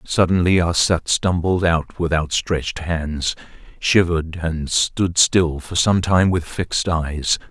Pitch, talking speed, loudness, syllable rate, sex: 85 Hz, 135 wpm, -19 LUFS, 3.8 syllables/s, male